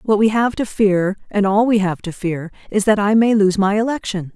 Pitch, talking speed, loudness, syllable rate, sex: 205 Hz, 250 wpm, -17 LUFS, 5.0 syllables/s, female